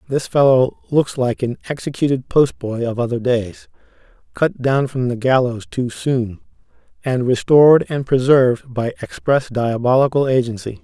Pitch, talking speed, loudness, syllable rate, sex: 125 Hz, 140 wpm, -17 LUFS, 4.7 syllables/s, male